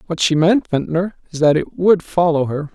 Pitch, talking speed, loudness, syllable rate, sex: 165 Hz, 220 wpm, -17 LUFS, 4.9 syllables/s, male